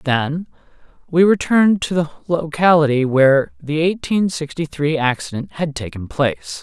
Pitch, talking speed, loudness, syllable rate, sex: 150 Hz, 135 wpm, -18 LUFS, 4.7 syllables/s, male